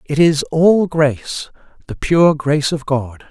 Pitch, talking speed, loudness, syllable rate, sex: 150 Hz, 145 wpm, -15 LUFS, 3.9 syllables/s, male